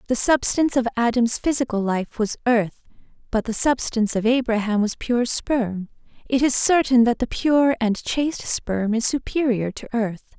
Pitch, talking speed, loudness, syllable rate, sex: 235 Hz, 170 wpm, -21 LUFS, 4.7 syllables/s, female